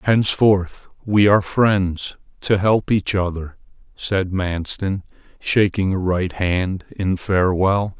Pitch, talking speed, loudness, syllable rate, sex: 95 Hz, 120 wpm, -19 LUFS, 3.6 syllables/s, male